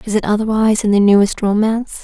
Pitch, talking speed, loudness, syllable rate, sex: 210 Hz, 205 wpm, -14 LUFS, 6.7 syllables/s, female